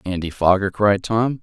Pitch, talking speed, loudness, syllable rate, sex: 100 Hz, 170 wpm, -19 LUFS, 4.5 syllables/s, male